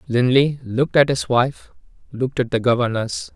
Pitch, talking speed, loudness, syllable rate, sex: 125 Hz, 160 wpm, -19 LUFS, 5.1 syllables/s, male